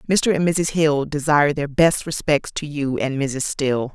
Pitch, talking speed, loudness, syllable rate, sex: 145 Hz, 200 wpm, -20 LUFS, 4.3 syllables/s, female